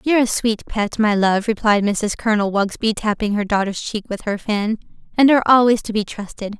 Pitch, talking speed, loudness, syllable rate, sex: 215 Hz, 210 wpm, -18 LUFS, 5.6 syllables/s, female